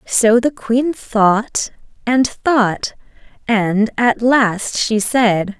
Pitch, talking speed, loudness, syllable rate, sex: 230 Hz, 120 wpm, -16 LUFS, 2.4 syllables/s, female